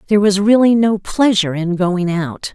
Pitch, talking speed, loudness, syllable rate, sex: 195 Hz, 190 wpm, -15 LUFS, 5.1 syllables/s, female